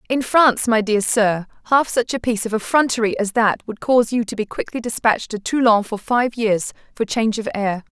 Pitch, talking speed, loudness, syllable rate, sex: 225 Hz, 220 wpm, -19 LUFS, 5.6 syllables/s, female